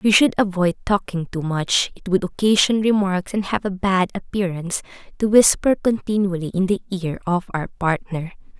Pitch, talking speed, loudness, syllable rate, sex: 190 Hz, 170 wpm, -20 LUFS, 5.0 syllables/s, female